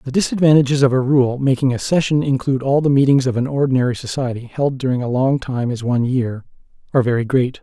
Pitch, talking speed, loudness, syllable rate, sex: 130 Hz, 210 wpm, -17 LUFS, 6.4 syllables/s, male